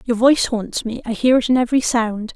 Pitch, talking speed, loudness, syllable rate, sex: 240 Hz, 255 wpm, -18 LUFS, 5.9 syllables/s, female